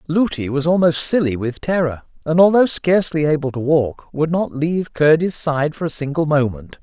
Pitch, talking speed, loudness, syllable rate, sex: 155 Hz, 185 wpm, -18 LUFS, 5.1 syllables/s, male